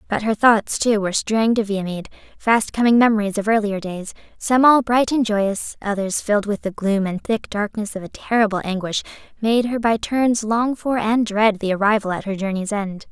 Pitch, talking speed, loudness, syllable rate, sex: 215 Hz, 205 wpm, -19 LUFS, 5.1 syllables/s, female